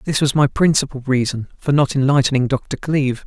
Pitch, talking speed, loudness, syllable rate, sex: 135 Hz, 185 wpm, -18 LUFS, 5.7 syllables/s, male